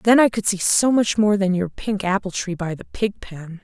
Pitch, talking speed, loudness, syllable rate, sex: 200 Hz, 265 wpm, -20 LUFS, 4.7 syllables/s, female